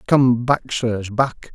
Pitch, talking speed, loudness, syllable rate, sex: 120 Hz, 155 wpm, -19 LUFS, 2.9 syllables/s, male